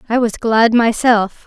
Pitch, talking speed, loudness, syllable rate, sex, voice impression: 225 Hz, 165 wpm, -14 LUFS, 3.9 syllables/s, female, very feminine, young, slightly thin, tensed, very powerful, slightly bright, slightly hard, clear, fluent, cute, slightly intellectual, refreshing, sincere, calm, friendly, slightly reassuring, very unique, elegant, slightly wild, sweet, lively, strict, slightly intense, slightly sharp, slightly light